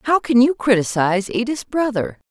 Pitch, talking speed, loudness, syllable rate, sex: 235 Hz, 155 wpm, -18 LUFS, 5.1 syllables/s, female